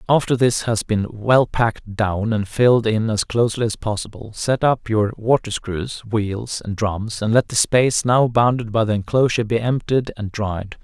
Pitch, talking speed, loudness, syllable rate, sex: 110 Hz, 195 wpm, -19 LUFS, 4.7 syllables/s, male